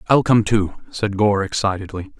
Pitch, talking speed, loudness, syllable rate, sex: 105 Hz, 165 wpm, -19 LUFS, 5.1 syllables/s, male